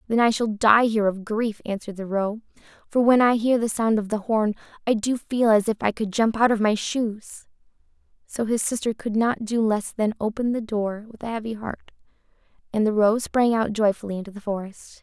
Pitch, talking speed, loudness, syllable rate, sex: 220 Hz, 220 wpm, -23 LUFS, 5.4 syllables/s, female